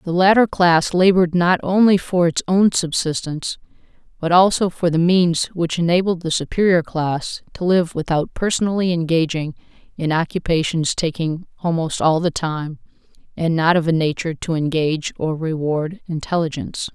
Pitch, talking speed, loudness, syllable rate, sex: 170 Hz, 150 wpm, -19 LUFS, 5.0 syllables/s, female